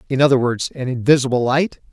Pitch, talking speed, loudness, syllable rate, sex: 130 Hz, 190 wpm, -17 LUFS, 6.3 syllables/s, male